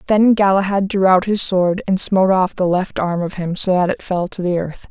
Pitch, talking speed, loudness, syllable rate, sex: 190 Hz, 255 wpm, -17 LUFS, 5.1 syllables/s, female